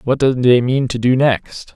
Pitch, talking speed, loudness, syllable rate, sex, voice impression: 125 Hz, 240 wpm, -15 LUFS, 4.2 syllables/s, male, very masculine, very adult-like, middle-aged, very thick, tensed, powerful, slightly bright, soft, slightly muffled, fluent, very cool, very intellectual, slightly refreshing, sincere, very calm, very mature, very friendly, very reassuring, unique, very elegant, slightly wild, very sweet, lively, very kind